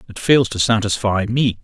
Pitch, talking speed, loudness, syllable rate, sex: 110 Hz, 185 wpm, -17 LUFS, 4.9 syllables/s, male